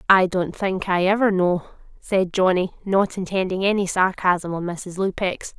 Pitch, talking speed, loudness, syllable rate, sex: 185 Hz, 160 wpm, -21 LUFS, 4.5 syllables/s, female